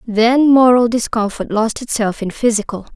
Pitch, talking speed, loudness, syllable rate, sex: 230 Hz, 140 wpm, -15 LUFS, 4.7 syllables/s, female